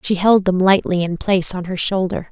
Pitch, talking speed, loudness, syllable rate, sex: 185 Hz, 235 wpm, -16 LUFS, 5.4 syllables/s, female